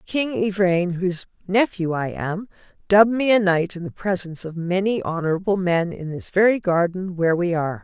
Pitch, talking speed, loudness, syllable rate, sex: 185 Hz, 185 wpm, -21 LUFS, 5.4 syllables/s, female